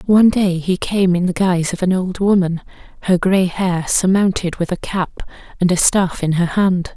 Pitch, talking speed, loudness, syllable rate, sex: 185 Hz, 205 wpm, -16 LUFS, 4.9 syllables/s, female